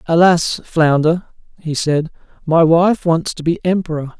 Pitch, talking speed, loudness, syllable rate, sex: 165 Hz, 145 wpm, -15 LUFS, 4.2 syllables/s, male